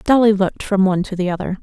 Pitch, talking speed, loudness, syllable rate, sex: 195 Hz, 260 wpm, -17 LUFS, 7.3 syllables/s, female